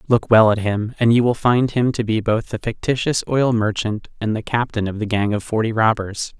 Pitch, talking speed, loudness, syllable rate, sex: 110 Hz, 235 wpm, -19 LUFS, 5.1 syllables/s, male